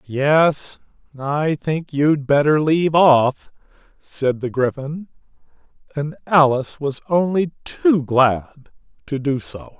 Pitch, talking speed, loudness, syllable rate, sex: 145 Hz, 115 wpm, -18 LUFS, 3.4 syllables/s, male